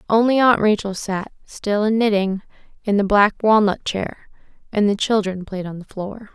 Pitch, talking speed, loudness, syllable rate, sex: 205 Hz, 180 wpm, -19 LUFS, 4.7 syllables/s, female